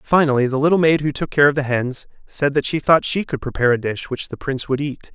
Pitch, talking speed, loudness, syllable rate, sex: 140 Hz, 280 wpm, -19 LUFS, 6.2 syllables/s, male